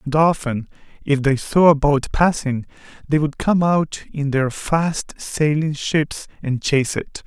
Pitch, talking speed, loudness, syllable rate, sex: 145 Hz, 165 wpm, -19 LUFS, 3.9 syllables/s, male